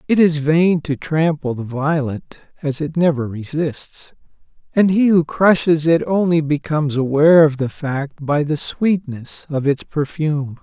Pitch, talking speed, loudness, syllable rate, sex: 150 Hz, 160 wpm, -17 LUFS, 4.2 syllables/s, male